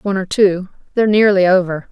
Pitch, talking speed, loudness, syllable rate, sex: 190 Hz, 190 wpm, -14 LUFS, 6.2 syllables/s, female